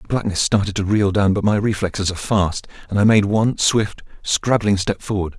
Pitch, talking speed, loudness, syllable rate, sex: 100 Hz, 210 wpm, -19 LUFS, 5.4 syllables/s, male